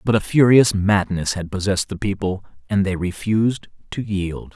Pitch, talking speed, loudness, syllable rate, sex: 100 Hz, 170 wpm, -20 LUFS, 5.0 syllables/s, male